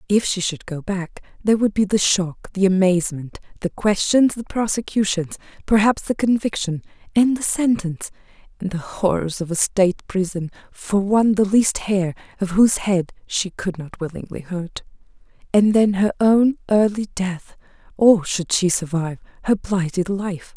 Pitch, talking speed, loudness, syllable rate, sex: 195 Hz, 160 wpm, -20 LUFS, 4.8 syllables/s, female